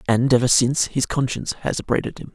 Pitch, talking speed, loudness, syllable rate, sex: 130 Hz, 205 wpm, -20 LUFS, 6.4 syllables/s, male